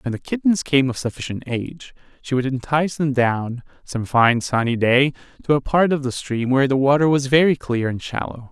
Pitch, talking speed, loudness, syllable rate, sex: 135 Hz, 210 wpm, -20 LUFS, 5.4 syllables/s, male